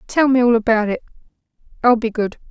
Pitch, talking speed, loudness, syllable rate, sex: 230 Hz, 190 wpm, -17 LUFS, 6.1 syllables/s, female